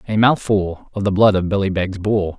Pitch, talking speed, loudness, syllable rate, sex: 100 Hz, 225 wpm, -18 LUFS, 5.0 syllables/s, male